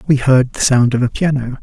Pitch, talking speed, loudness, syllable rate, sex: 130 Hz, 260 wpm, -14 LUFS, 5.4 syllables/s, male